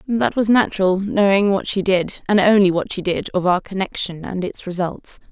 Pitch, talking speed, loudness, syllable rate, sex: 190 Hz, 205 wpm, -18 LUFS, 5.0 syllables/s, female